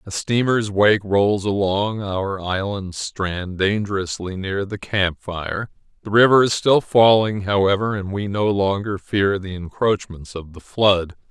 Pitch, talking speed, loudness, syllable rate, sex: 100 Hz, 155 wpm, -20 LUFS, 3.9 syllables/s, male